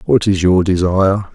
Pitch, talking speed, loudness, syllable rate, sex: 95 Hz, 180 wpm, -14 LUFS, 5.1 syllables/s, male